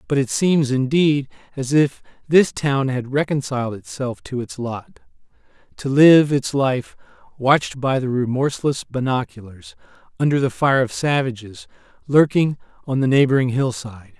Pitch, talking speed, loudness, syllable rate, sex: 135 Hz, 140 wpm, -19 LUFS, 4.7 syllables/s, male